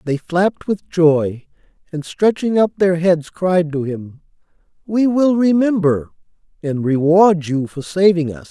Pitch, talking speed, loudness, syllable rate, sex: 170 Hz, 150 wpm, -16 LUFS, 4.1 syllables/s, male